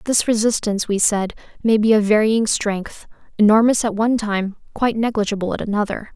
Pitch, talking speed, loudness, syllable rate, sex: 215 Hz, 165 wpm, -18 LUFS, 5.8 syllables/s, female